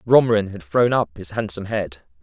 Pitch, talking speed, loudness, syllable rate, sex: 100 Hz, 190 wpm, -21 LUFS, 5.6 syllables/s, male